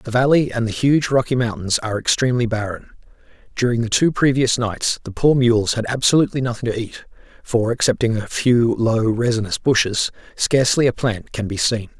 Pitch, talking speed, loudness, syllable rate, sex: 120 Hz, 180 wpm, -18 LUFS, 5.5 syllables/s, male